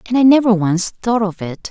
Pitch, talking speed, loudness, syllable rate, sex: 210 Hz, 245 wpm, -15 LUFS, 5.2 syllables/s, female